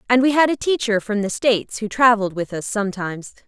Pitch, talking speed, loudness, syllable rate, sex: 220 Hz, 225 wpm, -19 LUFS, 6.3 syllables/s, female